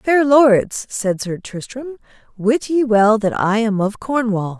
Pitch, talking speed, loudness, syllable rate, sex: 225 Hz, 170 wpm, -17 LUFS, 3.6 syllables/s, female